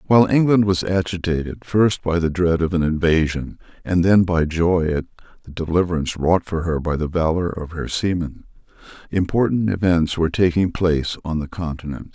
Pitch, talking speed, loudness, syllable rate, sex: 85 Hz, 175 wpm, -20 LUFS, 5.3 syllables/s, male